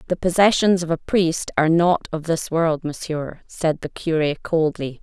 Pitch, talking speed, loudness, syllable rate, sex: 165 Hz, 180 wpm, -20 LUFS, 4.3 syllables/s, female